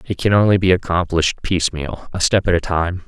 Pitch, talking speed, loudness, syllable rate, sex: 90 Hz, 215 wpm, -17 LUFS, 5.8 syllables/s, male